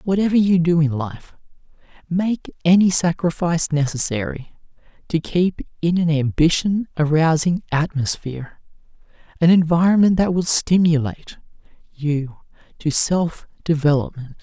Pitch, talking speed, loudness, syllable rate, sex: 165 Hz, 105 wpm, -19 LUFS, 4.6 syllables/s, male